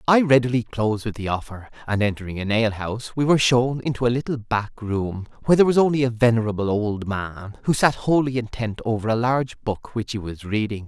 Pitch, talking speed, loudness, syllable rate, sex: 115 Hz, 215 wpm, -22 LUFS, 6.0 syllables/s, male